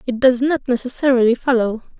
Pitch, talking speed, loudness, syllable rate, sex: 245 Hz, 150 wpm, -17 LUFS, 6.0 syllables/s, female